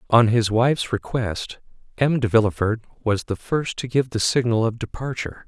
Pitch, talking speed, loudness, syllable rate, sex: 115 Hz, 175 wpm, -22 LUFS, 5.0 syllables/s, male